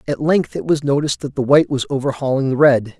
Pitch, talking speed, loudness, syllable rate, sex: 140 Hz, 240 wpm, -17 LUFS, 6.5 syllables/s, male